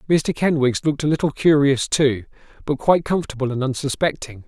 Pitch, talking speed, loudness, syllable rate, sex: 140 Hz, 160 wpm, -20 LUFS, 6.0 syllables/s, male